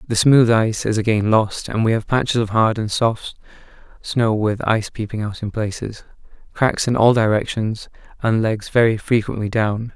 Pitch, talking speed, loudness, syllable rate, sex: 110 Hz, 180 wpm, -19 LUFS, 4.9 syllables/s, male